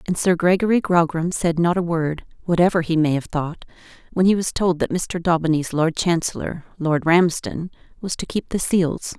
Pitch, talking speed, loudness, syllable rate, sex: 170 Hz, 190 wpm, -20 LUFS, 4.9 syllables/s, female